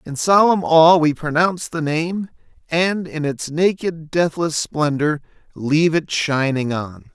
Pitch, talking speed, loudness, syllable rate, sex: 160 Hz, 145 wpm, -18 LUFS, 4.0 syllables/s, male